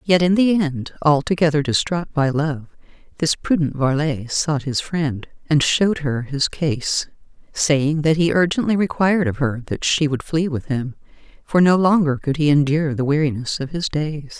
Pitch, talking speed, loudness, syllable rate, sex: 150 Hz, 180 wpm, -19 LUFS, 4.7 syllables/s, female